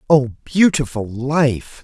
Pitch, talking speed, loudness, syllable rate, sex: 135 Hz, 100 wpm, -18 LUFS, 3.0 syllables/s, male